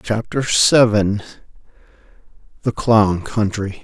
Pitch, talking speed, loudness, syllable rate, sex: 110 Hz, 80 wpm, -17 LUFS, 3.5 syllables/s, male